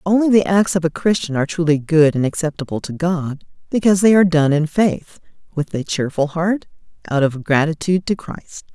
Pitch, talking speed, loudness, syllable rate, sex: 165 Hz, 190 wpm, -17 LUFS, 5.6 syllables/s, female